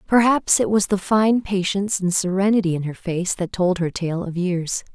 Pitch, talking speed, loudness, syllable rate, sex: 190 Hz, 205 wpm, -20 LUFS, 4.9 syllables/s, female